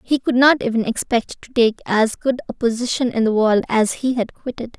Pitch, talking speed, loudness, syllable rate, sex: 235 Hz, 225 wpm, -19 LUFS, 5.2 syllables/s, female